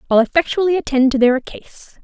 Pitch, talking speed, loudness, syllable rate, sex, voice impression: 280 Hz, 175 wpm, -16 LUFS, 5.7 syllables/s, female, feminine, adult-like, fluent, intellectual, slightly friendly